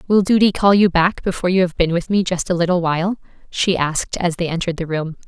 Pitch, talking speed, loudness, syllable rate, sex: 180 Hz, 250 wpm, -18 LUFS, 6.3 syllables/s, female